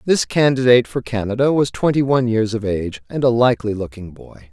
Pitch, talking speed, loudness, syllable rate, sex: 120 Hz, 200 wpm, -17 LUFS, 6.1 syllables/s, male